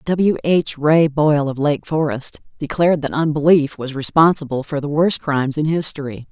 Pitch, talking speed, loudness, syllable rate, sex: 150 Hz, 170 wpm, -17 LUFS, 5.0 syllables/s, female